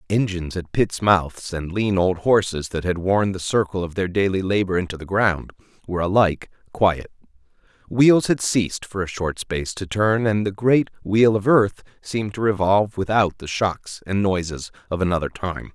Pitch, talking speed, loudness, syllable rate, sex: 95 Hz, 185 wpm, -21 LUFS, 5.0 syllables/s, male